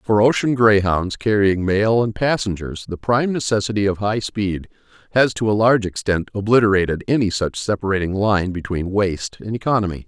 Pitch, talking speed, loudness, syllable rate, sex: 105 Hz, 160 wpm, -19 LUFS, 5.5 syllables/s, male